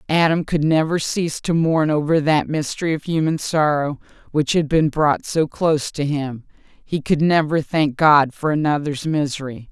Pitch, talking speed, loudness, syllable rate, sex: 150 Hz, 175 wpm, -19 LUFS, 4.7 syllables/s, female